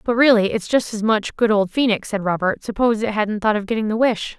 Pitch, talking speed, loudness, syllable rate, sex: 215 Hz, 260 wpm, -19 LUFS, 5.8 syllables/s, female